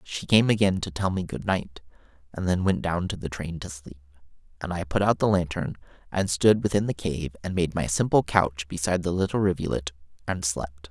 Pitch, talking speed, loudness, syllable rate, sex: 90 Hz, 215 wpm, -25 LUFS, 5.5 syllables/s, male